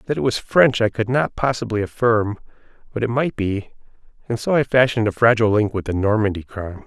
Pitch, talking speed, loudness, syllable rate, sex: 110 Hz, 210 wpm, -19 LUFS, 6.1 syllables/s, male